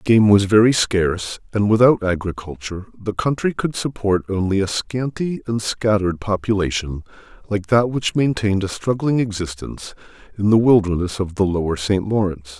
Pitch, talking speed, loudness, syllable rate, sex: 105 Hz, 150 wpm, -19 LUFS, 5.2 syllables/s, male